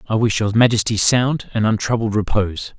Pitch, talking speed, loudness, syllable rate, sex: 110 Hz, 175 wpm, -18 LUFS, 5.5 syllables/s, male